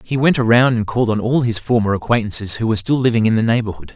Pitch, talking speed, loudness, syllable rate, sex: 115 Hz, 260 wpm, -16 LUFS, 7.0 syllables/s, male